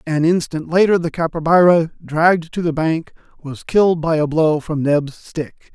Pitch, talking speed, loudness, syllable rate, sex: 160 Hz, 180 wpm, -17 LUFS, 4.6 syllables/s, male